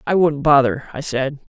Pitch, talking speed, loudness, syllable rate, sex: 140 Hz, 195 wpm, -18 LUFS, 4.7 syllables/s, male